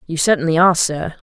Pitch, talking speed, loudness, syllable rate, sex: 165 Hz, 190 wpm, -16 LUFS, 6.4 syllables/s, female